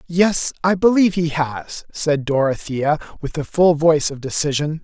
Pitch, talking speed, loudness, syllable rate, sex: 160 Hz, 160 wpm, -18 LUFS, 4.7 syllables/s, male